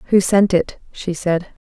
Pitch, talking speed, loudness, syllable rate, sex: 185 Hz, 180 wpm, -18 LUFS, 4.2 syllables/s, female